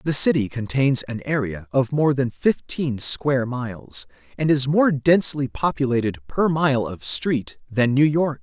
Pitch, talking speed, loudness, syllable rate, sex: 135 Hz, 165 wpm, -21 LUFS, 4.3 syllables/s, male